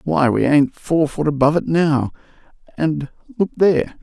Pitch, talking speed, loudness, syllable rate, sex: 150 Hz, 150 wpm, -18 LUFS, 4.7 syllables/s, male